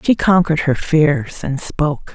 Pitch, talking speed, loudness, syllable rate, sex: 155 Hz, 170 wpm, -16 LUFS, 4.4 syllables/s, female